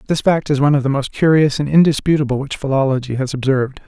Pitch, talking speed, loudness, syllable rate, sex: 140 Hz, 215 wpm, -16 LUFS, 6.8 syllables/s, male